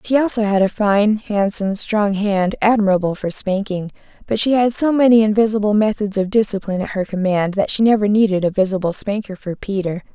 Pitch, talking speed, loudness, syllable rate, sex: 205 Hz, 190 wpm, -17 LUFS, 5.6 syllables/s, female